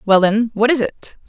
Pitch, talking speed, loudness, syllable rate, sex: 220 Hz, 235 wpm, -16 LUFS, 4.7 syllables/s, female